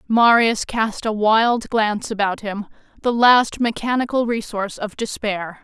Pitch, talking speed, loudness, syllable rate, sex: 220 Hz, 140 wpm, -19 LUFS, 4.3 syllables/s, female